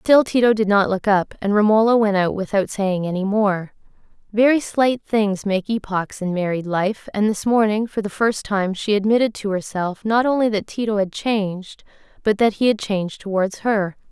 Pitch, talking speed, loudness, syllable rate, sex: 205 Hz, 195 wpm, -20 LUFS, 4.9 syllables/s, female